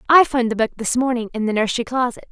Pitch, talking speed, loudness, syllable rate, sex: 240 Hz, 260 wpm, -19 LUFS, 6.9 syllables/s, female